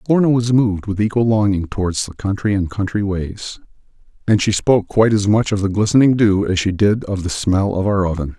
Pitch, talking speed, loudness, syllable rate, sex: 100 Hz, 220 wpm, -17 LUFS, 5.7 syllables/s, male